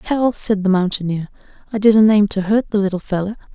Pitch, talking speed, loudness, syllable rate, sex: 200 Hz, 205 wpm, -17 LUFS, 5.6 syllables/s, female